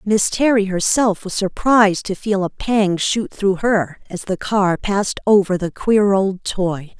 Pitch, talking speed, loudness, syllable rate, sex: 200 Hz, 180 wpm, -18 LUFS, 4.0 syllables/s, female